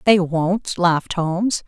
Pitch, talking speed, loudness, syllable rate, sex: 180 Hz, 145 wpm, -19 LUFS, 3.9 syllables/s, female